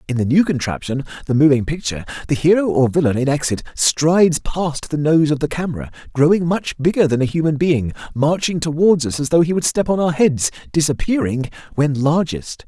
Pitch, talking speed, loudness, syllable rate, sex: 150 Hz, 195 wpm, -17 LUFS, 5.6 syllables/s, male